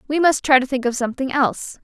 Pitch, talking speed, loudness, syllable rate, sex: 270 Hz, 260 wpm, -19 LUFS, 6.6 syllables/s, female